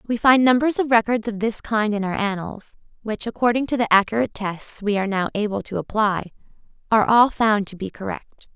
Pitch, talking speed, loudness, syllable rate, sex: 220 Hz, 205 wpm, -21 LUFS, 5.8 syllables/s, female